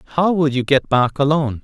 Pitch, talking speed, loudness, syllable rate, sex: 145 Hz, 220 wpm, -17 LUFS, 6.2 syllables/s, male